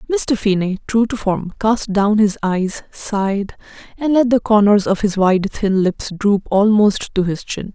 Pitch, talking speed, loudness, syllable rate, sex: 205 Hz, 185 wpm, -17 LUFS, 4.1 syllables/s, female